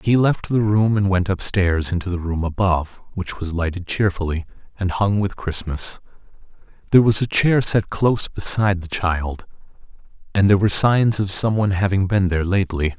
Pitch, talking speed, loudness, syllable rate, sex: 95 Hz, 185 wpm, -19 LUFS, 5.4 syllables/s, male